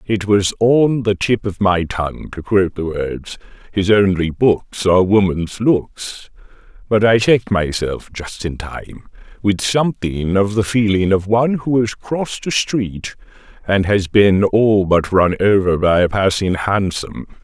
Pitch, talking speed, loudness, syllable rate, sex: 100 Hz, 160 wpm, -16 LUFS, 4.2 syllables/s, male